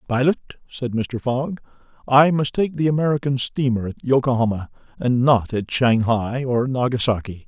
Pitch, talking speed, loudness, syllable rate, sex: 125 Hz, 145 wpm, -20 LUFS, 4.9 syllables/s, male